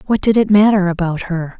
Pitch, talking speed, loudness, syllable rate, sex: 190 Hz, 225 wpm, -14 LUFS, 5.6 syllables/s, female